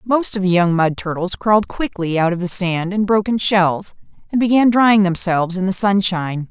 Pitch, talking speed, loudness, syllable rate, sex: 190 Hz, 205 wpm, -17 LUFS, 5.1 syllables/s, female